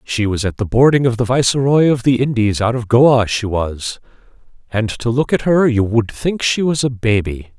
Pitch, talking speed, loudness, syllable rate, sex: 120 Hz, 220 wpm, -16 LUFS, 4.9 syllables/s, male